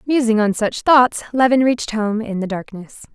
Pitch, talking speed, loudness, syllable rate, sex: 230 Hz, 190 wpm, -17 LUFS, 4.9 syllables/s, female